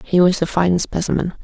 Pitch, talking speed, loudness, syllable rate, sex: 175 Hz, 210 wpm, -18 LUFS, 5.3 syllables/s, female